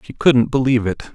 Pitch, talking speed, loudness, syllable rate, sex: 125 Hz, 210 wpm, -17 LUFS, 6.3 syllables/s, male